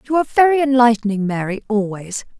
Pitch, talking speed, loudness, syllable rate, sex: 235 Hz, 150 wpm, -17 LUFS, 6.3 syllables/s, female